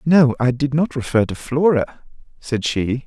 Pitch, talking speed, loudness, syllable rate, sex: 135 Hz, 175 wpm, -19 LUFS, 4.2 syllables/s, male